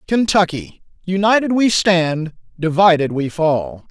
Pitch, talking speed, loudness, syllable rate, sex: 180 Hz, 90 wpm, -16 LUFS, 4.0 syllables/s, male